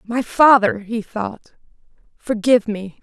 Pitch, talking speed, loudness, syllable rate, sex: 220 Hz, 120 wpm, -17 LUFS, 4.1 syllables/s, female